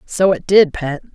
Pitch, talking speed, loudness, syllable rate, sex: 175 Hz, 210 wpm, -15 LUFS, 4.3 syllables/s, female